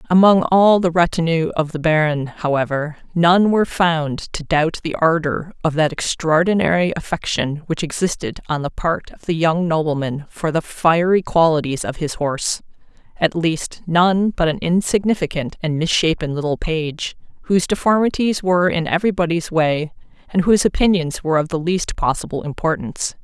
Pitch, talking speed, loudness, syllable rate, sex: 165 Hz, 155 wpm, -18 LUFS, 5.1 syllables/s, female